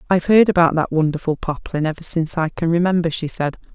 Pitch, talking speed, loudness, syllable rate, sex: 165 Hz, 210 wpm, -19 LUFS, 6.4 syllables/s, female